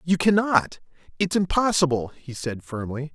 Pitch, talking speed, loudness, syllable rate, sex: 160 Hz, 135 wpm, -23 LUFS, 4.6 syllables/s, male